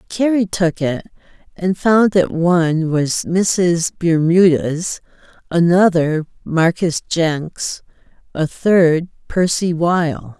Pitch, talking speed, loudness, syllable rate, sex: 170 Hz, 100 wpm, -16 LUFS, 3.0 syllables/s, female